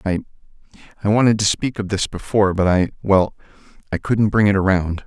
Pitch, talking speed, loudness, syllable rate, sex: 100 Hz, 165 wpm, -18 LUFS, 5.9 syllables/s, male